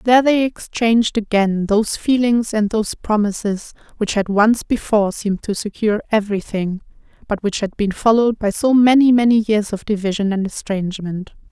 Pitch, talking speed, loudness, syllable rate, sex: 215 Hz, 160 wpm, -18 LUFS, 5.4 syllables/s, female